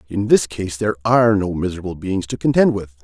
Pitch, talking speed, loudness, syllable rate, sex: 100 Hz, 215 wpm, -18 LUFS, 6.2 syllables/s, male